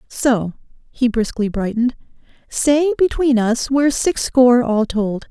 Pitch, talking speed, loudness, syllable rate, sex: 245 Hz, 135 wpm, -17 LUFS, 4.3 syllables/s, female